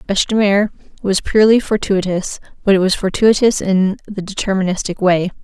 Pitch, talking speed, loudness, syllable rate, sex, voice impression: 195 Hz, 155 wpm, -16 LUFS, 5.3 syllables/s, female, feminine, adult-like, slightly refreshing, friendly, slightly kind